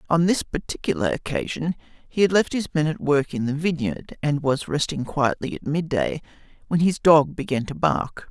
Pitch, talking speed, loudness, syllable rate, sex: 150 Hz, 190 wpm, -23 LUFS, 5.0 syllables/s, male